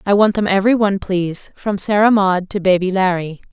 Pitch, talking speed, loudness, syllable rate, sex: 195 Hz, 205 wpm, -16 LUFS, 5.8 syllables/s, female